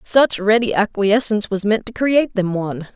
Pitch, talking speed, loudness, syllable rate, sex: 215 Hz, 185 wpm, -18 LUFS, 5.3 syllables/s, female